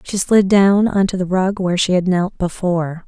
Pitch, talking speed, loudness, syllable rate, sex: 185 Hz, 235 wpm, -16 LUFS, 5.1 syllables/s, female